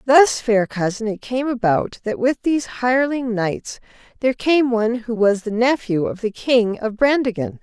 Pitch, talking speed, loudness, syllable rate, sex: 230 Hz, 180 wpm, -19 LUFS, 4.8 syllables/s, female